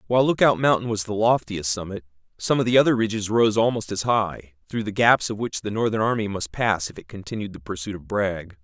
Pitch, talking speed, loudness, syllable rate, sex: 105 Hz, 230 wpm, -22 LUFS, 5.8 syllables/s, male